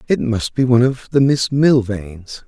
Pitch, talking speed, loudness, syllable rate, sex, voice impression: 125 Hz, 195 wpm, -16 LUFS, 4.5 syllables/s, male, masculine, middle-aged, slightly thick, slightly intellectual, calm, slightly friendly, slightly reassuring